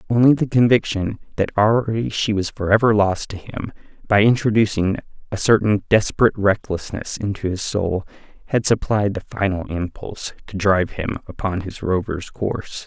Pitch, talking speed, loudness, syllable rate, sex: 105 Hz, 155 wpm, -20 LUFS, 5.1 syllables/s, male